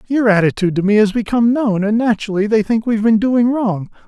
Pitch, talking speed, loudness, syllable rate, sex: 220 Hz, 220 wpm, -15 LUFS, 6.4 syllables/s, male